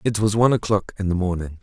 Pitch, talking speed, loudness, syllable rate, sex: 100 Hz, 260 wpm, -21 LUFS, 6.8 syllables/s, male